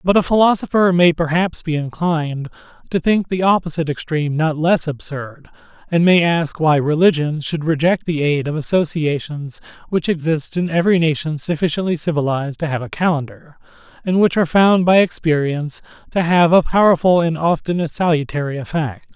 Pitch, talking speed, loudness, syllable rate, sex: 160 Hz, 165 wpm, -17 LUFS, 5.4 syllables/s, male